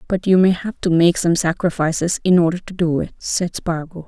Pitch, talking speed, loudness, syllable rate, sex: 175 Hz, 220 wpm, -18 LUFS, 5.2 syllables/s, female